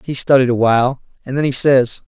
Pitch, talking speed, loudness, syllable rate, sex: 130 Hz, 225 wpm, -15 LUFS, 5.8 syllables/s, male